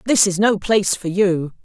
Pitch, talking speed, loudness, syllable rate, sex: 195 Hz, 220 wpm, -17 LUFS, 4.9 syllables/s, female